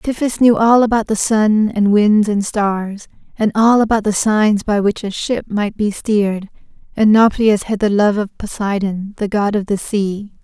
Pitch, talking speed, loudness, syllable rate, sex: 210 Hz, 195 wpm, -15 LUFS, 4.3 syllables/s, female